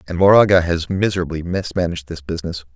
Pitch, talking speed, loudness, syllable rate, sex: 85 Hz, 150 wpm, -18 LUFS, 6.7 syllables/s, male